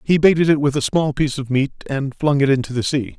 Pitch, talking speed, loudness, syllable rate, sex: 140 Hz, 285 wpm, -18 LUFS, 6.1 syllables/s, male